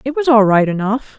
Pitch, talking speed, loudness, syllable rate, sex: 230 Hz, 250 wpm, -14 LUFS, 5.5 syllables/s, female